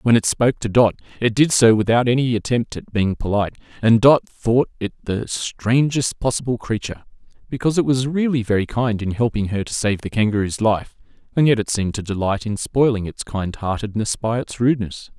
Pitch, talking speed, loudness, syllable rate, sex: 115 Hz, 195 wpm, -19 LUFS, 5.6 syllables/s, male